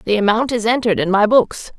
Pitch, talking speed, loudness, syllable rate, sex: 220 Hz, 235 wpm, -16 LUFS, 5.8 syllables/s, female